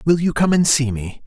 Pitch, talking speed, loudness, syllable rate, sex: 145 Hz, 285 wpm, -17 LUFS, 5.3 syllables/s, male